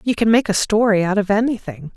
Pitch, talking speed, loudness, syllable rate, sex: 210 Hz, 245 wpm, -17 LUFS, 6.0 syllables/s, female